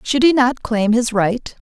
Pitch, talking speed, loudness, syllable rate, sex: 240 Hz, 215 wpm, -16 LUFS, 4.1 syllables/s, female